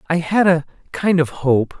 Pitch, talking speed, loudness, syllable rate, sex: 160 Hz, 200 wpm, -17 LUFS, 4.6 syllables/s, male